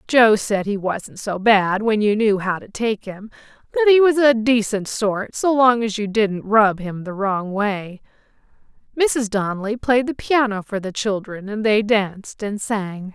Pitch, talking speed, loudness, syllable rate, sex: 215 Hz, 190 wpm, -19 LUFS, 4.2 syllables/s, female